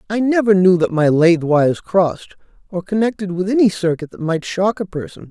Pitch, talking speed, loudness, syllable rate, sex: 185 Hz, 205 wpm, -16 LUFS, 5.5 syllables/s, male